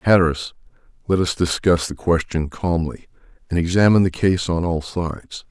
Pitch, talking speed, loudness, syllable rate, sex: 85 Hz, 155 wpm, -20 LUFS, 5.3 syllables/s, male